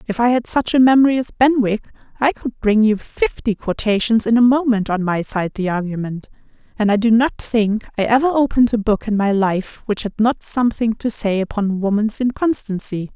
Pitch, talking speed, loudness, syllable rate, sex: 225 Hz, 200 wpm, -18 LUFS, 5.2 syllables/s, female